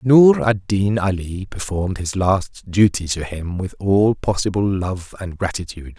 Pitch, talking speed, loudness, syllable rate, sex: 95 Hz, 160 wpm, -19 LUFS, 4.3 syllables/s, male